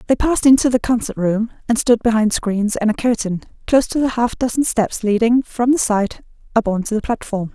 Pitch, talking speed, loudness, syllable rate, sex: 230 Hz, 225 wpm, -17 LUFS, 5.5 syllables/s, female